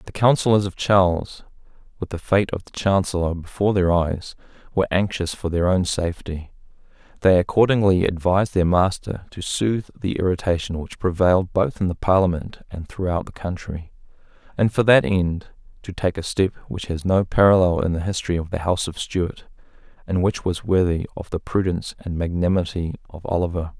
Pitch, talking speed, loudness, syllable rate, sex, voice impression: 90 Hz, 175 wpm, -21 LUFS, 5.5 syllables/s, male, very masculine, very adult-like, middle-aged, thick, slightly tensed, slightly weak, slightly dark, slightly soft, slightly muffled, fluent, cool, very intellectual, slightly refreshing, very sincere, very calm, mature, very friendly, very reassuring, unique, slightly elegant, wild, very sweet, slightly lively, kind, slightly modest